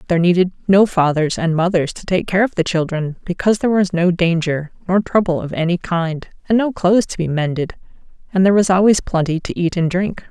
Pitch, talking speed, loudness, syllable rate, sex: 180 Hz, 215 wpm, -17 LUFS, 5.9 syllables/s, female